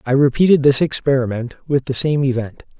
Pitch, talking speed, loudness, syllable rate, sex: 135 Hz, 170 wpm, -17 LUFS, 5.5 syllables/s, male